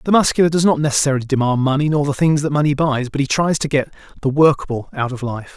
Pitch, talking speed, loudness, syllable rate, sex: 145 Hz, 250 wpm, -17 LUFS, 6.7 syllables/s, male